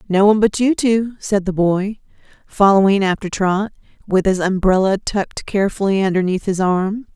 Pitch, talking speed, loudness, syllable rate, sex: 195 Hz, 160 wpm, -17 LUFS, 5.2 syllables/s, female